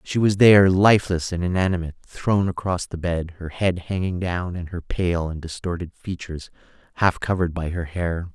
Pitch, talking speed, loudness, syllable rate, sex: 90 Hz, 180 wpm, -22 LUFS, 5.3 syllables/s, male